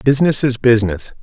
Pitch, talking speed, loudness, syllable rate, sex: 120 Hz, 145 wpm, -14 LUFS, 6.5 syllables/s, male